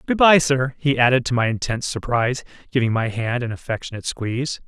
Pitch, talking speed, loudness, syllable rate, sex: 125 Hz, 190 wpm, -20 LUFS, 6.2 syllables/s, male